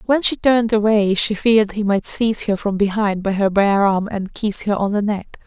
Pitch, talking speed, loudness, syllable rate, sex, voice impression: 205 Hz, 240 wpm, -18 LUFS, 5.1 syllables/s, female, feminine, slightly adult-like, slightly fluent, slightly cute, sincere, slightly calm, friendly, slightly sweet